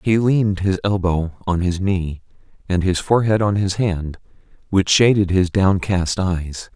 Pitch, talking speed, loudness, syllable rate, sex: 95 Hz, 160 wpm, -19 LUFS, 4.4 syllables/s, male